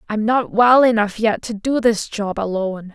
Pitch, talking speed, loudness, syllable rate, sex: 220 Hz, 205 wpm, -18 LUFS, 4.7 syllables/s, female